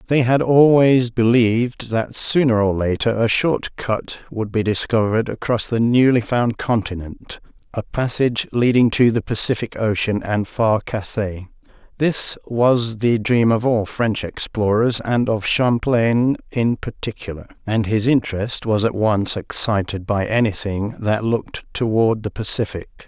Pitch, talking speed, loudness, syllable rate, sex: 110 Hz, 145 wpm, -19 LUFS, 4.3 syllables/s, male